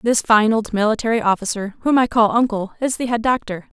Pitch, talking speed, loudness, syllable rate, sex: 225 Hz, 205 wpm, -18 LUFS, 5.8 syllables/s, female